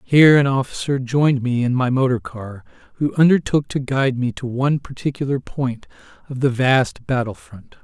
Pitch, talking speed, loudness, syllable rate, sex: 130 Hz, 175 wpm, -19 LUFS, 5.2 syllables/s, male